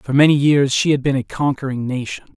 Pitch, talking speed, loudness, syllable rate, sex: 135 Hz, 230 wpm, -17 LUFS, 5.8 syllables/s, male